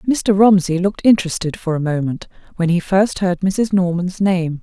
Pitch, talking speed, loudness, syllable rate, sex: 185 Hz, 180 wpm, -17 LUFS, 5.1 syllables/s, female